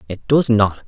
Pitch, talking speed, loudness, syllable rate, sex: 105 Hz, 205 wpm, -16 LUFS, 4.4 syllables/s, male